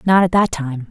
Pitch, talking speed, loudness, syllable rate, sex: 165 Hz, 265 wpm, -16 LUFS, 5.0 syllables/s, female